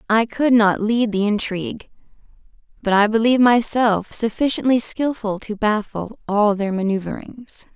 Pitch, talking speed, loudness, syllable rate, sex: 220 Hz, 130 wpm, -19 LUFS, 4.5 syllables/s, female